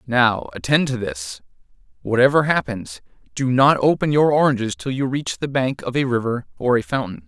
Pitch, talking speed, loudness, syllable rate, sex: 130 Hz, 180 wpm, -20 LUFS, 5.1 syllables/s, male